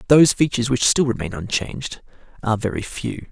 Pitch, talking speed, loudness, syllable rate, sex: 125 Hz, 165 wpm, -20 LUFS, 6.3 syllables/s, male